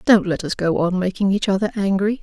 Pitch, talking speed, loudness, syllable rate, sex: 195 Hz, 240 wpm, -19 LUFS, 5.8 syllables/s, female